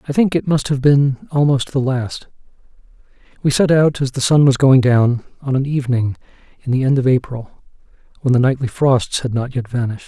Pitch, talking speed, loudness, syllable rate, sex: 135 Hz, 205 wpm, -16 LUFS, 5.4 syllables/s, male